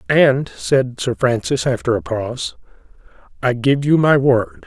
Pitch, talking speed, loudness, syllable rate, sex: 130 Hz, 155 wpm, -17 LUFS, 4.1 syllables/s, male